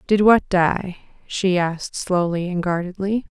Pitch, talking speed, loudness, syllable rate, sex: 185 Hz, 145 wpm, -20 LUFS, 4.2 syllables/s, female